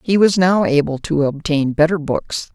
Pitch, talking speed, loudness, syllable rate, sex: 160 Hz, 190 wpm, -17 LUFS, 4.6 syllables/s, female